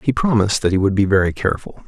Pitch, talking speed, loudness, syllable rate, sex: 105 Hz, 255 wpm, -17 LUFS, 7.3 syllables/s, male